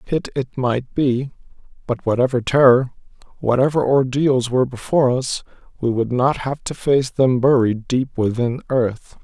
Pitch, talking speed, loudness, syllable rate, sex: 125 Hz, 150 wpm, -19 LUFS, 4.5 syllables/s, male